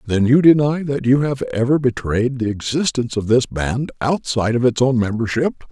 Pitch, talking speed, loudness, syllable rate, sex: 125 Hz, 190 wpm, -18 LUFS, 5.2 syllables/s, male